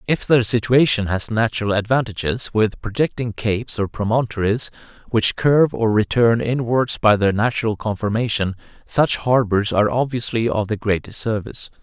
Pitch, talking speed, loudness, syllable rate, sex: 110 Hz, 140 wpm, -19 LUFS, 5.2 syllables/s, male